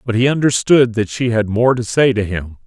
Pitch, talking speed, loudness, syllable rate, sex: 115 Hz, 250 wpm, -15 LUFS, 5.2 syllables/s, male